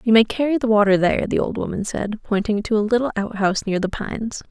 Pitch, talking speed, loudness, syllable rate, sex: 215 Hz, 240 wpm, -20 LUFS, 6.5 syllables/s, female